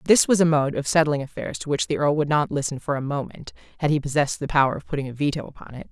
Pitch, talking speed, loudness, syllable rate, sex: 145 Hz, 285 wpm, -23 LUFS, 7.0 syllables/s, female